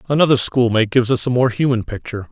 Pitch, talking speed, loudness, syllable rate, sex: 120 Hz, 205 wpm, -17 LUFS, 7.5 syllables/s, male